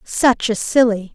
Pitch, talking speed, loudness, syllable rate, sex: 230 Hz, 155 wpm, -16 LUFS, 3.8 syllables/s, female